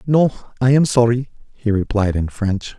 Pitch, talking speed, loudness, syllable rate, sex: 115 Hz, 170 wpm, -18 LUFS, 4.6 syllables/s, male